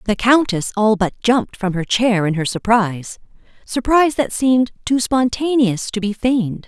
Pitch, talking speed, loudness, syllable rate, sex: 225 Hz, 160 wpm, -17 LUFS, 5.0 syllables/s, female